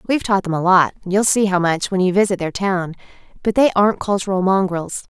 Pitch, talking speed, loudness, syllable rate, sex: 190 Hz, 200 wpm, -17 LUFS, 5.9 syllables/s, female